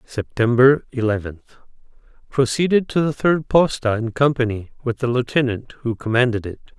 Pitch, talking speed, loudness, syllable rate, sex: 125 Hz, 125 wpm, -19 LUFS, 5.3 syllables/s, male